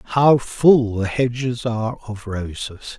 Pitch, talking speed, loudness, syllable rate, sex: 115 Hz, 140 wpm, -19 LUFS, 3.8 syllables/s, male